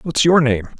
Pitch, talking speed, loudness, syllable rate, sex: 140 Hz, 230 wpm, -15 LUFS, 5.5 syllables/s, male